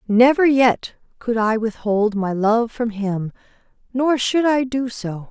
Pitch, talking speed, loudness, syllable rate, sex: 230 Hz, 160 wpm, -19 LUFS, 3.7 syllables/s, female